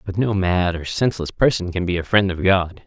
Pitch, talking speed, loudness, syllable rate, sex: 95 Hz, 250 wpm, -20 LUFS, 5.5 syllables/s, male